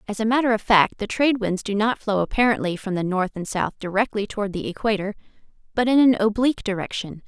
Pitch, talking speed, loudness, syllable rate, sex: 210 Hz, 215 wpm, -22 LUFS, 6.3 syllables/s, female